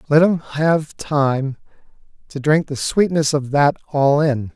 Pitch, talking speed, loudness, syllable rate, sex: 145 Hz, 160 wpm, -18 LUFS, 3.7 syllables/s, male